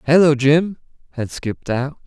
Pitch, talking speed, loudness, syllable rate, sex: 145 Hz, 145 wpm, -18 LUFS, 4.7 syllables/s, male